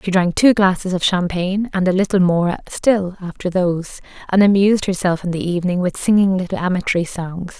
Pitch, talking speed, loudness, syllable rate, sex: 185 Hz, 190 wpm, -17 LUFS, 5.7 syllables/s, female